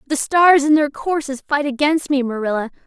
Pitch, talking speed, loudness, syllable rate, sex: 285 Hz, 190 wpm, -17 LUFS, 5.3 syllables/s, female